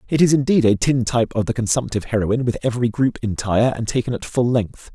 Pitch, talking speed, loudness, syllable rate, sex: 120 Hz, 220 wpm, -19 LUFS, 6.6 syllables/s, male